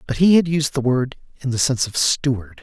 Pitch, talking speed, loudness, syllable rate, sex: 135 Hz, 250 wpm, -19 LUFS, 5.9 syllables/s, male